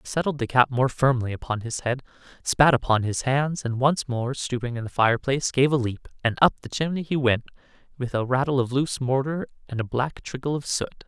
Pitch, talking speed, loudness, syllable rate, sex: 130 Hz, 220 wpm, -24 LUFS, 5.6 syllables/s, male